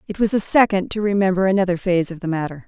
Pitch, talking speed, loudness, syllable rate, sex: 185 Hz, 245 wpm, -19 LUFS, 7.2 syllables/s, female